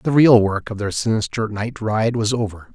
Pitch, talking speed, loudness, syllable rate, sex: 110 Hz, 220 wpm, -19 LUFS, 4.8 syllables/s, male